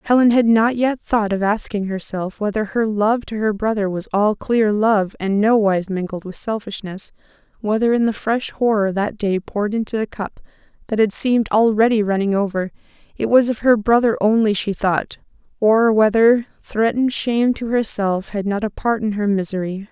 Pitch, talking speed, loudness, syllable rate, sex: 215 Hz, 180 wpm, -18 LUFS, 5.0 syllables/s, female